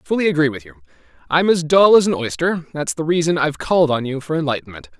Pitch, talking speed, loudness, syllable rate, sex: 150 Hz, 240 wpm, -17 LUFS, 7.0 syllables/s, male